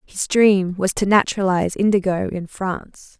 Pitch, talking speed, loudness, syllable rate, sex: 190 Hz, 150 wpm, -19 LUFS, 4.9 syllables/s, female